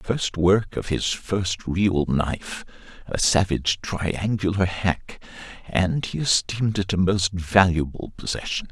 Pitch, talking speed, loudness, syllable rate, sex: 95 Hz, 150 wpm, -23 LUFS, 5.3 syllables/s, male